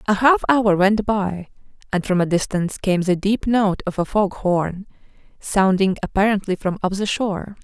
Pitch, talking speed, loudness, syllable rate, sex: 195 Hz, 180 wpm, -20 LUFS, 4.7 syllables/s, female